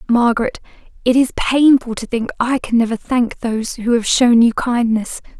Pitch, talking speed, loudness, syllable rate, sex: 240 Hz, 180 wpm, -16 LUFS, 4.9 syllables/s, female